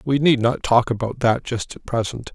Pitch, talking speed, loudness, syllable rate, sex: 120 Hz, 230 wpm, -20 LUFS, 4.9 syllables/s, male